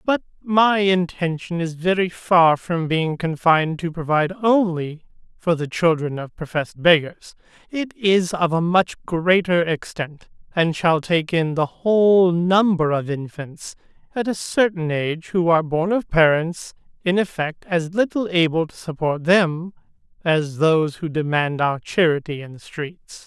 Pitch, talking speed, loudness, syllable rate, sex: 170 Hz, 155 wpm, -20 LUFS, 4.3 syllables/s, male